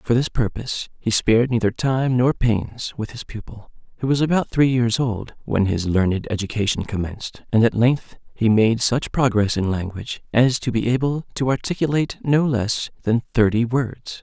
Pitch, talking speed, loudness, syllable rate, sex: 120 Hz, 180 wpm, -21 LUFS, 4.9 syllables/s, male